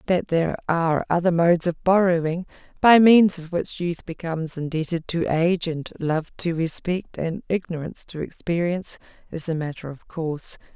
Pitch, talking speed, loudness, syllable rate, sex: 170 Hz, 160 wpm, -22 LUFS, 5.2 syllables/s, female